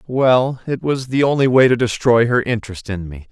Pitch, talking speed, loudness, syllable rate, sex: 120 Hz, 215 wpm, -17 LUFS, 5.2 syllables/s, male